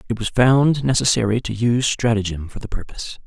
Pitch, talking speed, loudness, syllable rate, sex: 115 Hz, 185 wpm, -19 LUFS, 5.9 syllables/s, male